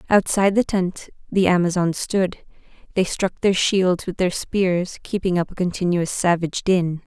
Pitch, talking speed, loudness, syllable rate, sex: 180 Hz, 160 wpm, -21 LUFS, 4.6 syllables/s, female